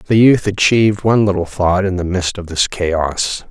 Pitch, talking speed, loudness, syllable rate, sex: 95 Hz, 205 wpm, -15 LUFS, 4.7 syllables/s, male